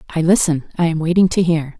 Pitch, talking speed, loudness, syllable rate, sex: 165 Hz, 200 wpm, -16 LUFS, 6.2 syllables/s, female